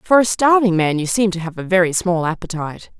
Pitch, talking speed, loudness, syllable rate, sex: 185 Hz, 240 wpm, -17 LUFS, 6.0 syllables/s, female